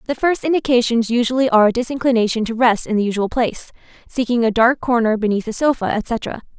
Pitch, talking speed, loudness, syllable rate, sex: 235 Hz, 190 wpm, -17 LUFS, 6.3 syllables/s, female